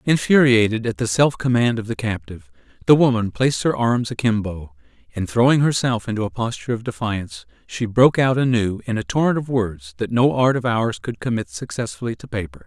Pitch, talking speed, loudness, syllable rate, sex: 115 Hz, 195 wpm, -20 LUFS, 5.7 syllables/s, male